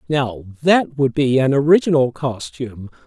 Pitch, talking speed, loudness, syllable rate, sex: 135 Hz, 135 wpm, -17 LUFS, 4.4 syllables/s, male